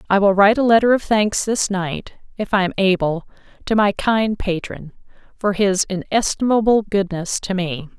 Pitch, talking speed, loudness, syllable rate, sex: 200 Hz, 175 wpm, -18 LUFS, 4.9 syllables/s, female